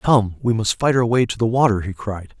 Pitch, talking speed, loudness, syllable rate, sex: 110 Hz, 275 wpm, -19 LUFS, 5.2 syllables/s, male